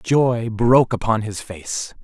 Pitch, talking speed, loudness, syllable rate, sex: 115 Hz, 150 wpm, -19 LUFS, 3.7 syllables/s, male